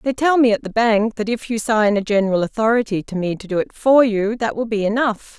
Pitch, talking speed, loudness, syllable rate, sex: 220 Hz, 265 wpm, -18 LUFS, 5.7 syllables/s, female